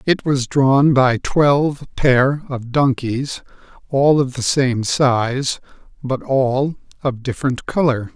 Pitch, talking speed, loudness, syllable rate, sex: 130 Hz, 130 wpm, -17 LUFS, 3.4 syllables/s, male